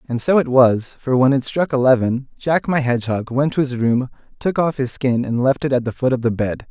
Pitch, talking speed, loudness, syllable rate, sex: 130 Hz, 260 wpm, -18 LUFS, 5.3 syllables/s, male